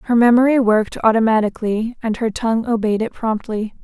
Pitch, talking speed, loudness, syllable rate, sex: 225 Hz, 155 wpm, -17 LUFS, 6.0 syllables/s, female